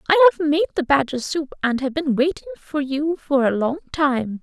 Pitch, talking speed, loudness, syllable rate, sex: 270 Hz, 215 wpm, -20 LUFS, 5.0 syllables/s, female